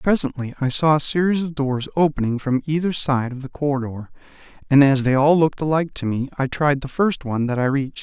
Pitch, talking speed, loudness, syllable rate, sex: 140 Hz, 225 wpm, -20 LUFS, 6.0 syllables/s, male